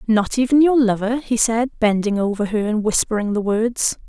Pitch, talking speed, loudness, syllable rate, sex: 225 Hz, 190 wpm, -18 LUFS, 4.9 syllables/s, female